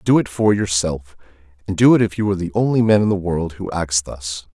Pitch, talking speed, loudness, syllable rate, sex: 95 Hz, 250 wpm, -18 LUFS, 5.7 syllables/s, male